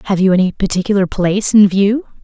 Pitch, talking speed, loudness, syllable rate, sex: 195 Hz, 190 wpm, -13 LUFS, 6.2 syllables/s, female